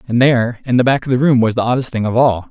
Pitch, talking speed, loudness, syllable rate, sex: 120 Hz, 335 wpm, -15 LUFS, 6.9 syllables/s, male